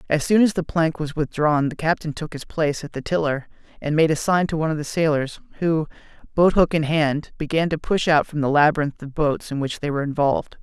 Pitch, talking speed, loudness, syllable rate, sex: 155 Hz, 245 wpm, -21 LUFS, 5.8 syllables/s, male